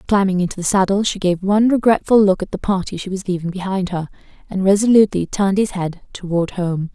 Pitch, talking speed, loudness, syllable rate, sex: 190 Hz, 205 wpm, -18 LUFS, 6.1 syllables/s, female